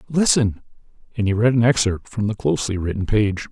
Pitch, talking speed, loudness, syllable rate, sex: 110 Hz, 190 wpm, -20 LUFS, 5.8 syllables/s, male